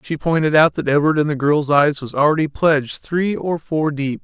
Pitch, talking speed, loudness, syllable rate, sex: 150 Hz, 225 wpm, -17 LUFS, 5.1 syllables/s, male